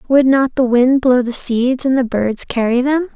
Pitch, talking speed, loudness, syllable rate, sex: 255 Hz, 230 wpm, -15 LUFS, 4.5 syllables/s, female